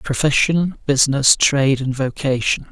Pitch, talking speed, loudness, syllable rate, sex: 140 Hz, 110 wpm, -17 LUFS, 4.7 syllables/s, male